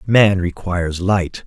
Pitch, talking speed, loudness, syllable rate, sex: 95 Hz, 125 wpm, -18 LUFS, 3.7 syllables/s, male